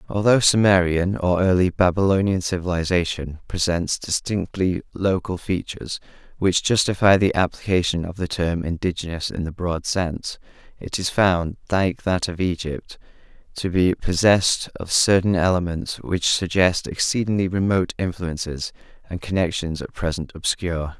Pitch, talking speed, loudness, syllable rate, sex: 90 Hz, 125 wpm, -21 LUFS, 4.7 syllables/s, male